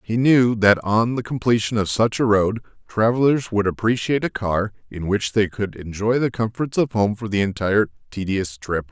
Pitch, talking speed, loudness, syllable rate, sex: 110 Hz, 195 wpm, -20 LUFS, 5.0 syllables/s, male